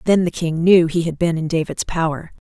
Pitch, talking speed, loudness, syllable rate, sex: 165 Hz, 245 wpm, -18 LUFS, 5.4 syllables/s, female